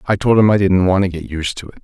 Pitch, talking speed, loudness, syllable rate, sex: 95 Hz, 360 wpm, -15 LUFS, 6.7 syllables/s, male